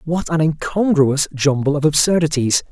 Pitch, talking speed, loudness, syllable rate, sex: 155 Hz, 135 wpm, -17 LUFS, 4.8 syllables/s, male